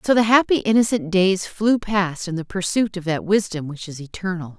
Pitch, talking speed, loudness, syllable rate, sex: 190 Hz, 210 wpm, -20 LUFS, 5.2 syllables/s, female